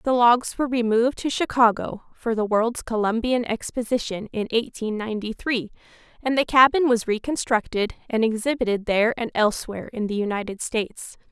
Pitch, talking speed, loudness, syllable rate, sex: 230 Hz, 155 wpm, -23 LUFS, 5.4 syllables/s, female